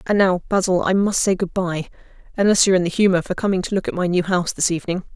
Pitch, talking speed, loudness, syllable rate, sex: 185 Hz, 255 wpm, -19 LUFS, 7.0 syllables/s, female